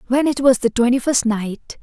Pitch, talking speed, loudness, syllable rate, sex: 250 Hz, 230 wpm, -17 LUFS, 4.9 syllables/s, female